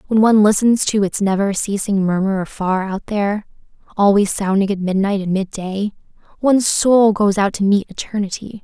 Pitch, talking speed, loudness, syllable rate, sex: 200 Hz, 165 wpm, -17 LUFS, 5.2 syllables/s, female